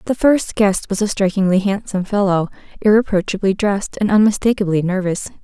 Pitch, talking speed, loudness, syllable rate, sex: 200 Hz, 145 wpm, -17 LUFS, 5.8 syllables/s, female